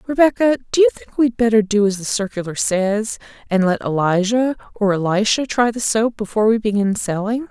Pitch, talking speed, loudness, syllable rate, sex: 220 Hz, 185 wpm, -18 LUFS, 5.6 syllables/s, female